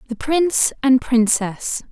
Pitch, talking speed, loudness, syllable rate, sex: 255 Hz, 125 wpm, -18 LUFS, 3.8 syllables/s, female